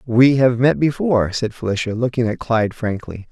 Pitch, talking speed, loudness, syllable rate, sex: 120 Hz, 180 wpm, -18 LUFS, 5.4 syllables/s, male